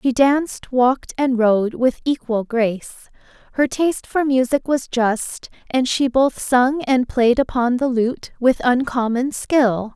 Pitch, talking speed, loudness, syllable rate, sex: 250 Hz, 155 wpm, -19 LUFS, 4.0 syllables/s, female